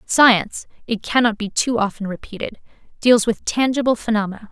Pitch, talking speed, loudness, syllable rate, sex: 225 Hz, 145 wpm, -19 LUFS, 5.5 syllables/s, female